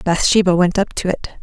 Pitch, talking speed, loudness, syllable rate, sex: 185 Hz, 210 wpm, -16 LUFS, 5.3 syllables/s, female